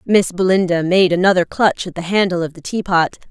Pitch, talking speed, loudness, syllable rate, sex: 180 Hz, 200 wpm, -16 LUFS, 5.7 syllables/s, female